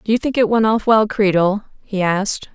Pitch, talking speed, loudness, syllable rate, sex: 210 Hz, 235 wpm, -17 LUFS, 5.3 syllables/s, female